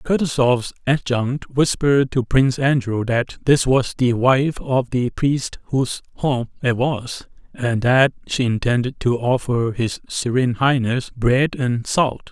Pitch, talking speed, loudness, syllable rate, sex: 125 Hz, 145 wpm, -19 LUFS, 4.1 syllables/s, male